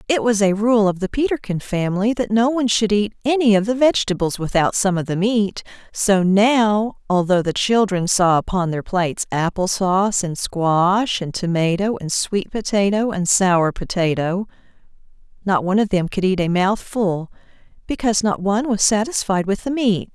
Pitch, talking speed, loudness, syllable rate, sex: 200 Hz, 175 wpm, -19 LUFS, 4.9 syllables/s, female